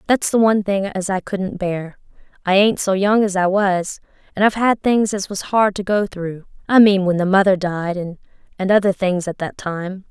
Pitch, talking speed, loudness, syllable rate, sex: 195 Hz, 215 wpm, -18 LUFS, 5.0 syllables/s, female